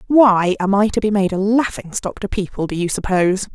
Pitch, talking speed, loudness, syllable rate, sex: 200 Hz, 235 wpm, -18 LUFS, 5.5 syllables/s, female